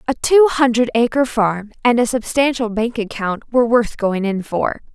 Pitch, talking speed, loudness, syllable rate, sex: 235 Hz, 180 wpm, -17 LUFS, 4.6 syllables/s, female